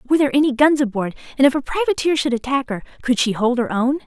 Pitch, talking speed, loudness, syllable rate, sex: 265 Hz, 250 wpm, -19 LUFS, 6.9 syllables/s, female